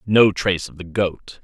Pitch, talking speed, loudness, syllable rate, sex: 95 Hz, 210 wpm, -20 LUFS, 4.5 syllables/s, male